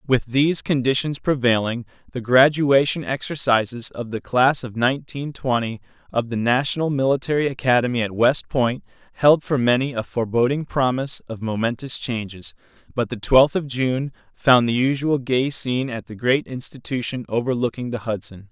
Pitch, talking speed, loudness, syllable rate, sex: 125 Hz, 150 wpm, -21 LUFS, 5.1 syllables/s, male